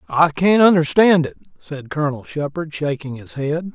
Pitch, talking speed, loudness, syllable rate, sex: 150 Hz, 160 wpm, -18 LUFS, 4.8 syllables/s, male